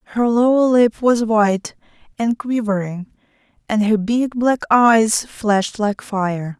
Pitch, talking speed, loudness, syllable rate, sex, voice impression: 220 Hz, 135 wpm, -17 LUFS, 3.9 syllables/s, female, feminine, adult-like, tensed, slightly powerful, slightly dark, soft, clear, intellectual, slightly friendly, elegant, lively, slightly strict, slightly sharp